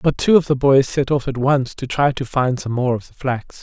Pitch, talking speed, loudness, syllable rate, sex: 135 Hz, 300 wpm, -18 LUFS, 5.1 syllables/s, male